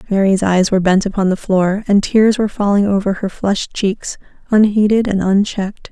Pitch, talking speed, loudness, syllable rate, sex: 200 Hz, 185 wpm, -15 LUFS, 5.4 syllables/s, female